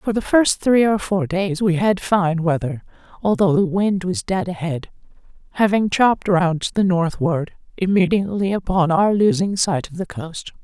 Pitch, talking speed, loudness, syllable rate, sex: 185 Hz, 175 wpm, -19 LUFS, 4.6 syllables/s, female